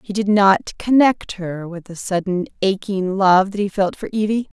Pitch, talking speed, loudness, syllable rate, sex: 195 Hz, 195 wpm, -18 LUFS, 4.5 syllables/s, female